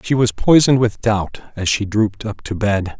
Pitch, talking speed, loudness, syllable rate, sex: 110 Hz, 220 wpm, -17 LUFS, 5.1 syllables/s, male